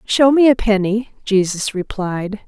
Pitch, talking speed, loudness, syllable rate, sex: 210 Hz, 145 wpm, -17 LUFS, 4.1 syllables/s, female